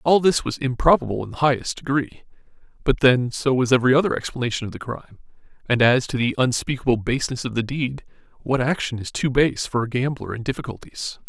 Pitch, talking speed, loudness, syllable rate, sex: 130 Hz, 195 wpm, -21 LUFS, 6.1 syllables/s, male